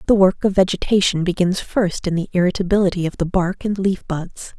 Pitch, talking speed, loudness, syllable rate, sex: 185 Hz, 195 wpm, -19 LUFS, 5.5 syllables/s, female